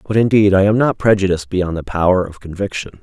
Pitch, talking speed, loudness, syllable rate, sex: 95 Hz, 220 wpm, -16 LUFS, 6.2 syllables/s, male